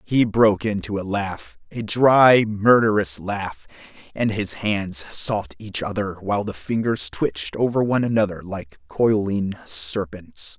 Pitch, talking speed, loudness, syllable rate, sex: 105 Hz, 140 wpm, -21 LUFS, 4.1 syllables/s, male